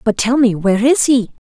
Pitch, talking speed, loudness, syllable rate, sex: 235 Hz, 235 wpm, -14 LUFS, 5.5 syllables/s, female